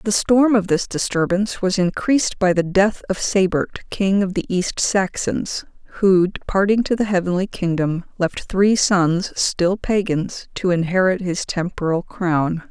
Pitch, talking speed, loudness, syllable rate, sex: 190 Hz, 155 wpm, -19 LUFS, 4.3 syllables/s, female